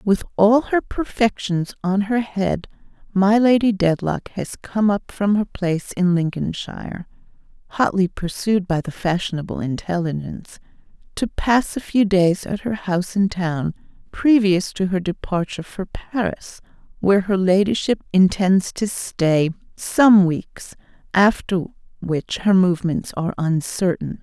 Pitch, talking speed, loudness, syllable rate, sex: 190 Hz, 135 wpm, -20 LUFS, 3.8 syllables/s, female